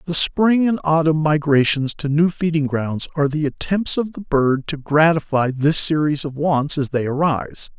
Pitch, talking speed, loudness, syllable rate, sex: 150 Hz, 185 wpm, -18 LUFS, 4.7 syllables/s, male